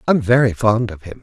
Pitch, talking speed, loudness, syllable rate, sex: 110 Hz, 245 wpm, -16 LUFS, 5.6 syllables/s, male